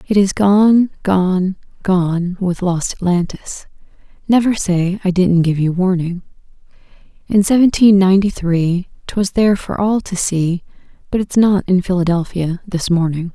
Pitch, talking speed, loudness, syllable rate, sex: 185 Hz, 145 wpm, -15 LUFS, 3.7 syllables/s, female